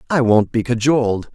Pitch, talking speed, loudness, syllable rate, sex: 120 Hz, 180 wpm, -17 LUFS, 5.3 syllables/s, male